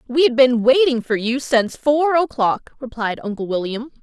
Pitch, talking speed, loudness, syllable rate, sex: 255 Hz, 180 wpm, -18 LUFS, 4.9 syllables/s, female